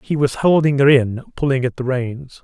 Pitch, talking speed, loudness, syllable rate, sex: 135 Hz, 220 wpm, -17 LUFS, 5.0 syllables/s, male